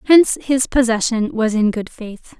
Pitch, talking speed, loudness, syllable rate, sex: 240 Hz, 175 wpm, -17 LUFS, 4.6 syllables/s, female